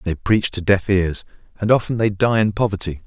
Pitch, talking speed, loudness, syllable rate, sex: 100 Hz, 215 wpm, -19 LUFS, 5.3 syllables/s, male